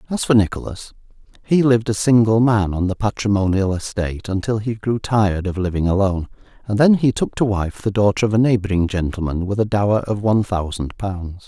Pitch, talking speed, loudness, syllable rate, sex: 105 Hz, 200 wpm, -19 LUFS, 5.8 syllables/s, male